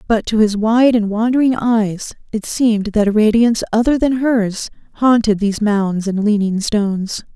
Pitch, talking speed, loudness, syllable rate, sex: 220 Hz, 170 wpm, -16 LUFS, 4.8 syllables/s, female